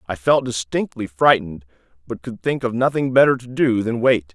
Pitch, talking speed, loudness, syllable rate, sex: 115 Hz, 195 wpm, -19 LUFS, 5.3 syllables/s, male